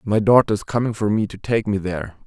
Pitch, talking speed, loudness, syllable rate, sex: 105 Hz, 265 wpm, -20 LUFS, 6.1 syllables/s, male